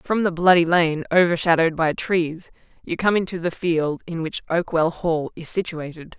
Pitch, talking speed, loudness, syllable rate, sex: 170 Hz, 175 wpm, -21 LUFS, 4.8 syllables/s, female